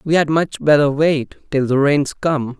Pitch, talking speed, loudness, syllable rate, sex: 145 Hz, 210 wpm, -17 LUFS, 4.2 syllables/s, male